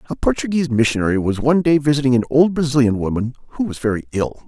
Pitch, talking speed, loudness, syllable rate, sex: 130 Hz, 200 wpm, -18 LUFS, 7.3 syllables/s, male